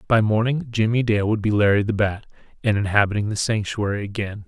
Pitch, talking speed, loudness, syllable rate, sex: 105 Hz, 190 wpm, -21 LUFS, 5.9 syllables/s, male